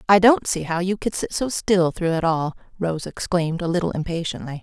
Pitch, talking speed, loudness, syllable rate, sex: 175 Hz, 220 wpm, -22 LUFS, 5.5 syllables/s, female